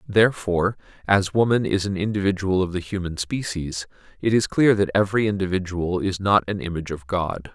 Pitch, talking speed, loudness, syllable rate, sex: 95 Hz, 175 wpm, -22 LUFS, 5.6 syllables/s, male